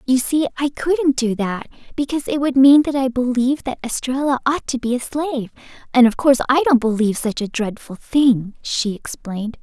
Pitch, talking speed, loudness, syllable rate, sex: 255 Hz, 200 wpm, -18 LUFS, 5.4 syllables/s, female